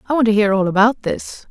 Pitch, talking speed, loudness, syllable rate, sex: 220 Hz, 280 wpm, -16 LUFS, 5.8 syllables/s, female